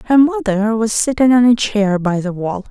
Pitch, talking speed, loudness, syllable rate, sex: 220 Hz, 220 wpm, -15 LUFS, 4.8 syllables/s, female